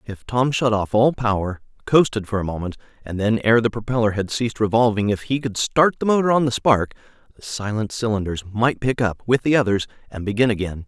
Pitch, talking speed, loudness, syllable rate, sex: 110 Hz, 215 wpm, -20 LUFS, 5.8 syllables/s, male